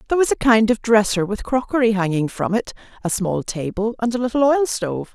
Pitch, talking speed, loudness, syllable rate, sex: 220 Hz, 220 wpm, -19 LUFS, 5.9 syllables/s, female